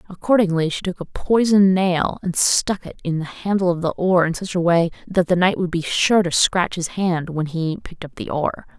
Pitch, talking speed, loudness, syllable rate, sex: 180 Hz, 240 wpm, -19 LUFS, 5.1 syllables/s, female